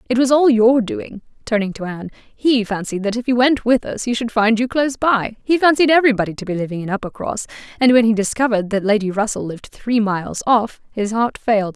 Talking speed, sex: 265 wpm, female